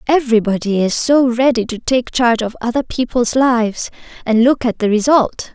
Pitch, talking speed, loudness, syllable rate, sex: 240 Hz, 175 wpm, -15 LUFS, 5.2 syllables/s, female